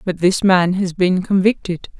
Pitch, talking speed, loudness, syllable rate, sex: 185 Hz, 180 wpm, -16 LUFS, 4.4 syllables/s, female